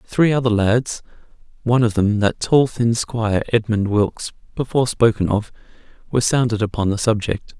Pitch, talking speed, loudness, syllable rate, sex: 115 Hz, 140 wpm, -19 LUFS, 5.4 syllables/s, male